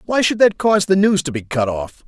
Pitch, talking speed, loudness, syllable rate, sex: 180 Hz, 290 wpm, -17 LUFS, 5.7 syllables/s, male